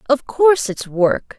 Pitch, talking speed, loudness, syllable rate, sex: 250 Hz, 175 wpm, -17 LUFS, 4.2 syllables/s, female